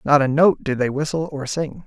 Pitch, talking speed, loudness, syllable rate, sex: 145 Hz, 260 wpm, -20 LUFS, 5.1 syllables/s, male